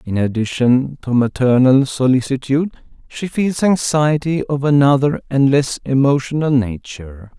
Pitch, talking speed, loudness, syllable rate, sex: 135 Hz, 115 wpm, -16 LUFS, 4.6 syllables/s, male